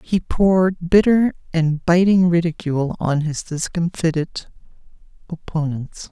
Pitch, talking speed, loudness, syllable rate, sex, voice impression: 170 Hz, 100 wpm, -19 LUFS, 4.3 syllables/s, female, feminine, middle-aged, tensed, slightly powerful, slightly hard, clear, intellectual, calm, reassuring, elegant, slightly strict, slightly sharp